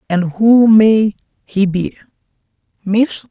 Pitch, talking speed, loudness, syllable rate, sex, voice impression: 205 Hz, 110 wpm, -13 LUFS, 3.0 syllables/s, male, masculine, slightly feminine, gender-neutral, adult-like, slightly middle-aged, slightly thick, very relaxed, weak, dark, soft, muffled, slightly halting, slightly cool, intellectual, sincere, very calm, slightly mature, slightly friendly, slightly reassuring, very unique, elegant, kind, very modest